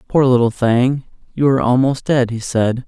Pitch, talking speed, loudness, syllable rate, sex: 125 Hz, 190 wpm, -16 LUFS, 4.9 syllables/s, male